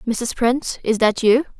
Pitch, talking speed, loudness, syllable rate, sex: 240 Hz, 190 wpm, -19 LUFS, 4.6 syllables/s, female